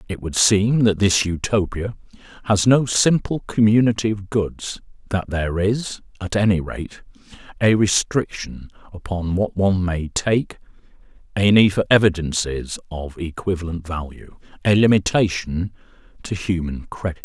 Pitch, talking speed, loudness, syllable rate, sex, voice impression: 95 Hz, 130 wpm, -20 LUFS, 4.5 syllables/s, male, masculine, very adult-like, slightly thick, slightly intellectual, slightly wild